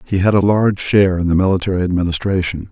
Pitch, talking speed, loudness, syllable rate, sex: 95 Hz, 200 wpm, -16 LUFS, 6.9 syllables/s, male